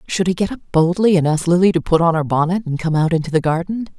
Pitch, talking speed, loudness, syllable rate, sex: 175 Hz, 285 wpm, -17 LUFS, 6.4 syllables/s, female